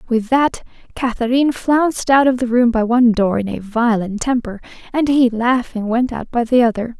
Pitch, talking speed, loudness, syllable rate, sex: 240 Hz, 195 wpm, -16 LUFS, 5.2 syllables/s, female